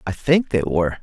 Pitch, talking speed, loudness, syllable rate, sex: 110 Hz, 235 wpm, -19 LUFS, 5.9 syllables/s, male